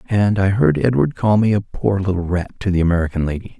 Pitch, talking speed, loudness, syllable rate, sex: 100 Hz, 235 wpm, -18 LUFS, 5.9 syllables/s, male